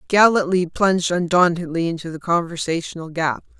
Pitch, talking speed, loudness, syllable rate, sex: 175 Hz, 115 wpm, -20 LUFS, 5.4 syllables/s, female